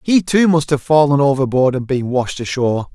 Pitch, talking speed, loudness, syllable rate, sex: 140 Hz, 205 wpm, -15 LUFS, 5.3 syllables/s, male